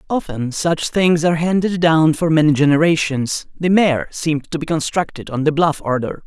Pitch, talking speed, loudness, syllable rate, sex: 160 Hz, 180 wpm, -17 LUFS, 5.0 syllables/s, male